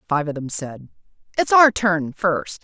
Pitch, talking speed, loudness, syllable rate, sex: 165 Hz, 180 wpm, -19 LUFS, 4.1 syllables/s, female